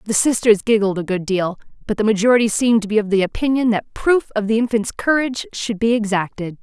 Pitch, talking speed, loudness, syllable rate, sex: 220 Hz, 215 wpm, -18 LUFS, 6.2 syllables/s, female